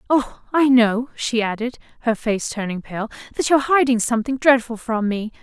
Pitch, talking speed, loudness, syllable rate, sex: 240 Hz, 190 wpm, -20 LUFS, 5.4 syllables/s, female